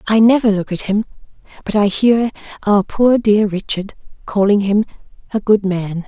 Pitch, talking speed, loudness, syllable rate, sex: 205 Hz, 170 wpm, -16 LUFS, 4.7 syllables/s, female